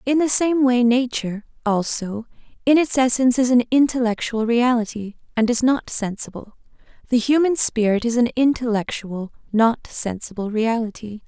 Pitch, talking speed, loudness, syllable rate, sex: 240 Hz, 140 wpm, -20 LUFS, 4.9 syllables/s, female